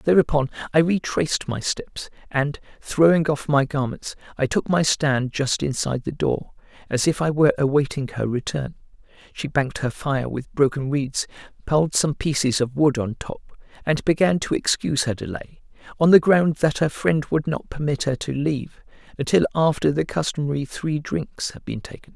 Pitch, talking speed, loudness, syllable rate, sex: 145 Hz, 180 wpm, -22 LUFS, 5.0 syllables/s, male